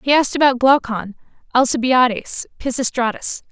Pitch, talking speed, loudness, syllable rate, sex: 245 Hz, 100 wpm, -17 LUFS, 5.3 syllables/s, female